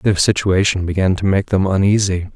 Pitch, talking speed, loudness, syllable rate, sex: 95 Hz, 180 wpm, -16 LUFS, 5.3 syllables/s, male